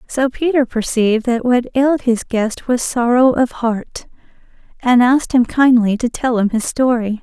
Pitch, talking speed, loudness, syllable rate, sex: 245 Hz, 175 wpm, -15 LUFS, 4.6 syllables/s, female